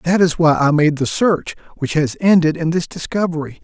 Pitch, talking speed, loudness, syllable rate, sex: 160 Hz, 215 wpm, -16 LUFS, 5.1 syllables/s, male